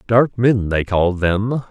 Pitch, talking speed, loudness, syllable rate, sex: 105 Hz, 175 wpm, -17 LUFS, 3.5 syllables/s, male